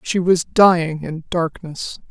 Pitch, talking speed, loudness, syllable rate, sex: 170 Hz, 140 wpm, -18 LUFS, 3.7 syllables/s, female